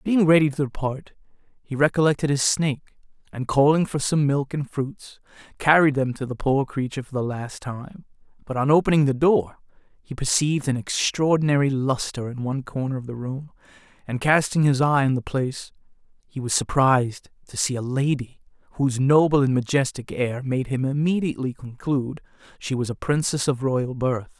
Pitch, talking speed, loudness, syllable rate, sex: 135 Hz, 175 wpm, -22 LUFS, 5.4 syllables/s, male